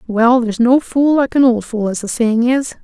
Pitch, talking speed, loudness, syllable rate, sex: 240 Hz, 255 wpm, -14 LUFS, 4.9 syllables/s, female